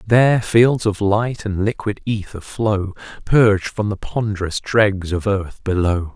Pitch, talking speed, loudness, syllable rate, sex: 105 Hz, 155 wpm, -18 LUFS, 3.7 syllables/s, male